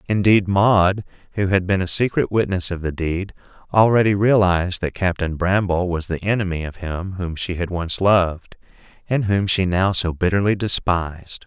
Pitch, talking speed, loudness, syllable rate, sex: 95 Hz, 175 wpm, -19 LUFS, 4.8 syllables/s, male